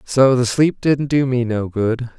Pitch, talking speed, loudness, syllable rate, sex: 125 Hz, 220 wpm, -17 LUFS, 3.9 syllables/s, male